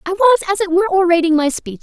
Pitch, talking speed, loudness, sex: 360 Hz, 265 wpm, -15 LUFS, female